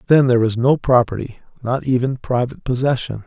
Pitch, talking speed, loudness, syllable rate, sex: 125 Hz, 165 wpm, -18 LUFS, 6.0 syllables/s, male